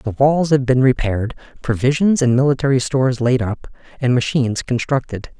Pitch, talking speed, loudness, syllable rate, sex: 130 Hz, 155 wpm, -17 LUFS, 5.5 syllables/s, male